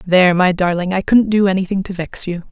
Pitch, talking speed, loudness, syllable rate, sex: 185 Hz, 240 wpm, -16 LUFS, 6.0 syllables/s, female